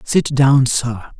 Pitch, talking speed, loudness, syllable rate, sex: 135 Hz, 150 wpm, -15 LUFS, 2.9 syllables/s, male